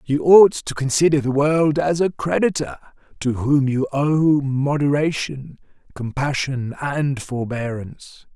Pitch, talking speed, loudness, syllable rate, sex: 140 Hz, 120 wpm, -19 LUFS, 4.0 syllables/s, male